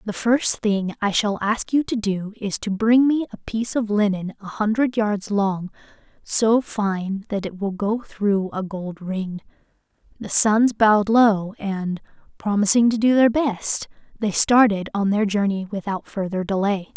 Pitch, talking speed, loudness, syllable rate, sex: 210 Hz, 175 wpm, -21 LUFS, 4.2 syllables/s, female